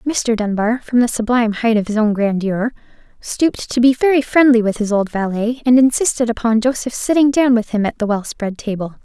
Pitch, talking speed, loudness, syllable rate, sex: 230 Hz, 210 wpm, -16 LUFS, 5.5 syllables/s, female